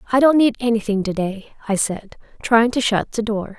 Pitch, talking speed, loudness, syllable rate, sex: 220 Hz, 215 wpm, -19 LUFS, 5.2 syllables/s, female